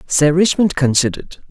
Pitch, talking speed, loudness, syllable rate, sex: 160 Hz, 120 wpm, -15 LUFS, 5.4 syllables/s, male